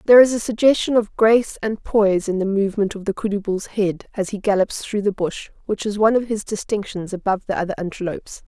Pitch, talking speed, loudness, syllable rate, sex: 205 Hz, 225 wpm, -20 LUFS, 6.1 syllables/s, female